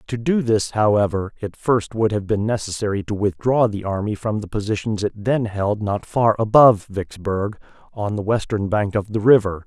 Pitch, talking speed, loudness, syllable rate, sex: 105 Hz, 190 wpm, -20 LUFS, 5.0 syllables/s, male